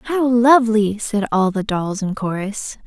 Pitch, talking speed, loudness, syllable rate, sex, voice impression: 215 Hz, 170 wpm, -18 LUFS, 4.1 syllables/s, female, feminine, slightly young, tensed, powerful, soft, clear, calm, friendly, lively